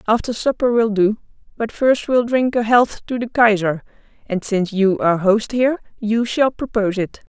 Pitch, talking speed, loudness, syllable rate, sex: 225 Hz, 190 wpm, -18 LUFS, 5.1 syllables/s, female